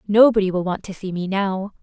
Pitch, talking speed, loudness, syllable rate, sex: 195 Hz, 230 wpm, -20 LUFS, 5.5 syllables/s, female